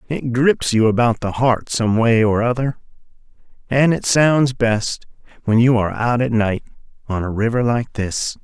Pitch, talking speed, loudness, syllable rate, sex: 120 Hz, 180 wpm, -18 LUFS, 4.5 syllables/s, male